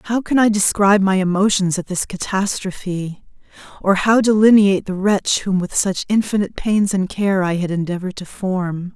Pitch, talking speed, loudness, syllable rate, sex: 195 Hz, 175 wpm, -17 LUFS, 5.1 syllables/s, female